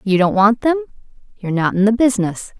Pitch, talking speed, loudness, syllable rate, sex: 215 Hz, 185 wpm, -16 LUFS, 6.4 syllables/s, female